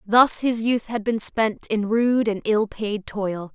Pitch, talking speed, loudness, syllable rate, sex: 215 Hz, 205 wpm, -22 LUFS, 3.5 syllables/s, female